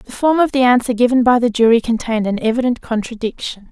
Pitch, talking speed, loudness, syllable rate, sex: 235 Hz, 210 wpm, -15 LUFS, 6.3 syllables/s, female